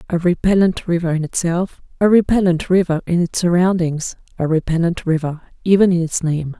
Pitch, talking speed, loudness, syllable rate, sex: 175 Hz, 165 wpm, -17 LUFS, 5.4 syllables/s, female